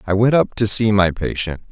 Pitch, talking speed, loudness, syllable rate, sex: 105 Hz, 245 wpm, -17 LUFS, 5.3 syllables/s, male